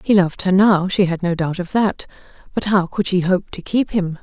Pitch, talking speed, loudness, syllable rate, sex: 185 Hz, 255 wpm, -18 LUFS, 5.2 syllables/s, female